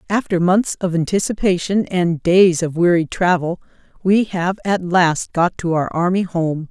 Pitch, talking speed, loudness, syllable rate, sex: 180 Hz, 160 wpm, -17 LUFS, 4.3 syllables/s, female